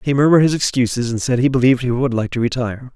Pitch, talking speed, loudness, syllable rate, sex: 125 Hz, 265 wpm, -17 LUFS, 7.4 syllables/s, male